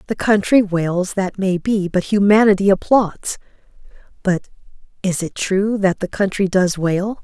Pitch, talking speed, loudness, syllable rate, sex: 195 Hz, 150 wpm, -17 LUFS, 4.2 syllables/s, female